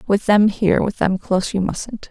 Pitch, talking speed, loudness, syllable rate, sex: 200 Hz, 230 wpm, -18 LUFS, 5.1 syllables/s, female